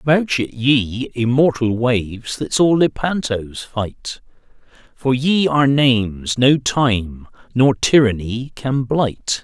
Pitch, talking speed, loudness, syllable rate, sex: 125 Hz, 120 wpm, -17 LUFS, 3.4 syllables/s, male